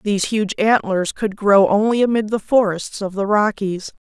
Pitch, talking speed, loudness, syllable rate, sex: 210 Hz, 175 wpm, -18 LUFS, 4.6 syllables/s, female